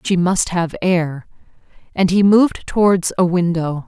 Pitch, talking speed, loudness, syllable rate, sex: 180 Hz, 155 wpm, -16 LUFS, 4.4 syllables/s, female